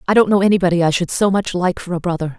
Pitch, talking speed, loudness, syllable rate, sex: 180 Hz, 300 wpm, -17 LUFS, 7.2 syllables/s, female